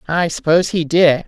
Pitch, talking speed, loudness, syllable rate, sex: 165 Hz, 190 wpm, -15 LUFS, 5.4 syllables/s, female